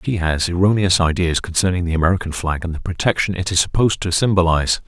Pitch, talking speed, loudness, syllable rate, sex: 90 Hz, 210 wpm, -18 LUFS, 6.7 syllables/s, male